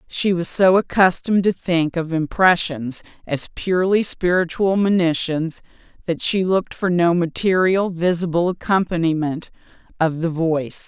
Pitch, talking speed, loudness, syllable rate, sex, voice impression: 175 Hz, 125 wpm, -19 LUFS, 4.6 syllables/s, female, feminine, middle-aged, tensed, powerful, clear, fluent, intellectual, reassuring, slightly wild, lively, slightly strict, intense, slightly sharp